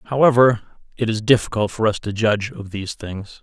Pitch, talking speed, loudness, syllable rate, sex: 110 Hz, 195 wpm, -19 LUFS, 5.6 syllables/s, male